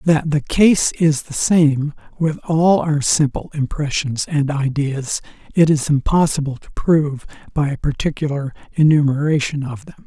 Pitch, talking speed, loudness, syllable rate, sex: 150 Hz, 145 wpm, -18 LUFS, 4.4 syllables/s, male